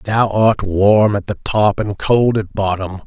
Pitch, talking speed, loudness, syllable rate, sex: 105 Hz, 195 wpm, -15 LUFS, 3.7 syllables/s, male